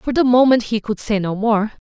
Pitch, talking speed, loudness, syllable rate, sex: 225 Hz, 255 wpm, -17 LUFS, 5.2 syllables/s, female